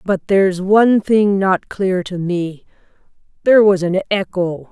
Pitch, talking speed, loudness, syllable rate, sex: 190 Hz, 155 wpm, -16 LUFS, 4.3 syllables/s, female